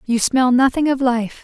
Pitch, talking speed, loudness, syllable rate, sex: 250 Hz, 210 wpm, -16 LUFS, 4.5 syllables/s, female